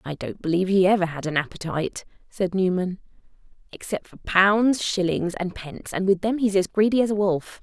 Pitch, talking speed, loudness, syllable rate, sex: 190 Hz, 195 wpm, -23 LUFS, 5.5 syllables/s, female